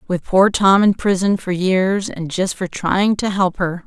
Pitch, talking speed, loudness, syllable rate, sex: 190 Hz, 200 wpm, -17 LUFS, 4.1 syllables/s, female